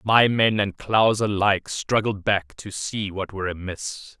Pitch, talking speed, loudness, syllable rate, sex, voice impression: 100 Hz, 170 wpm, -22 LUFS, 4.2 syllables/s, male, very masculine, very adult-like, clear, slightly unique, wild